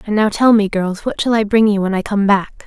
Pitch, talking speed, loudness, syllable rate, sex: 210 Hz, 315 wpm, -15 LUFS, 5.5 syllables/s, female